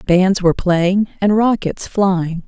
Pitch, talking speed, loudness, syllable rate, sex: 190 Hz, 145 wpm, -16 LUFS, 3.7 syllables/s, female